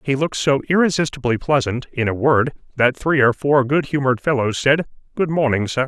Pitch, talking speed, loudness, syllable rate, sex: 135 Hz, 195 wpm, -18 LUFS, 5.7 syllables/s, male